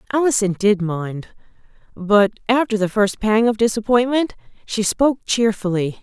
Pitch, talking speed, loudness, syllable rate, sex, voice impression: 215 Hz, 130 wpm, -18 LUFS, 4.7 syllables/s, female, very feminine, very adult-like, thin, tensed, very powerful, bright, slightly hard, very clear, very fluent, slightly raspy, very cool, very intellectual, very refreshing, sincere, slightly calm, very friendly, very reassuring, very unique, elegant, slightly wild, sweet, lively, slightly kind, slightly intense, slightly sharp, light